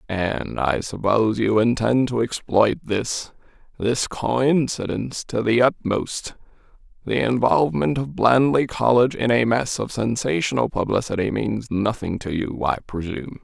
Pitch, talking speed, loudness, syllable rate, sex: 115 Hz, 125 wpm, -21 LUFS, 4.4 syllables/s, male